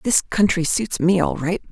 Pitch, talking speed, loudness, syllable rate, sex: 185 Hz, 210 wpm, -19 LUFS, 4.5 syllables/s, female